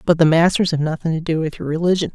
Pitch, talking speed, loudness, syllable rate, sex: 165 Hz, 280 wpm, -18 LUFS, 6.8 syllables/s, female